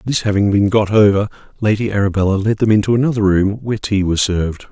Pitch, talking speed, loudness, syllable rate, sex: 105 Hz, 205 wpm, -15 LUFS, 6.4 syllables/s, male